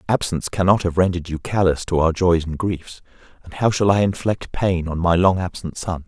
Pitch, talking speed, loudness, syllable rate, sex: 90 Hz, 215 wpm, -20 LUFS, 5.4 syllables/s, male